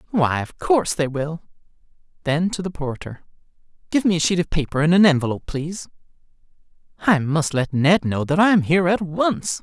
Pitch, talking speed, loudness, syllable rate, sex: 165 Hz, 180 wpm, -20 LUFS, 5.7 syllables/s, male